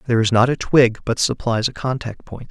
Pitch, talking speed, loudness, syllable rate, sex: 120 Hz, 240 wpm, -18 LUFS, 5.7 syllables/s, male